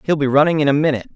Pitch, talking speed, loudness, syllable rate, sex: 145 Hz, 310 wpm, -16 LUFS, 9.0 syllables/s, male